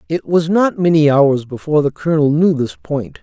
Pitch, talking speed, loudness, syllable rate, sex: 155 Hz, 205 wpm, -15 LUFS, 5.3 syllables/s, male